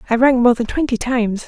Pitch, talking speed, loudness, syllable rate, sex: 240 Hz, 245 wpm, -16 LUFS, 6.3 syllables/s, female